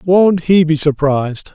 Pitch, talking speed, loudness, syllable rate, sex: 160 Hz, 155 wpm, -13 LUFS, 4.2 syllables/s, male